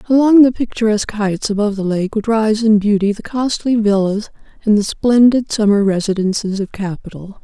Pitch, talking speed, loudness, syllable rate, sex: 215 Hz, 170 wpm, -15 LUFS, 5.4 syllables/s, female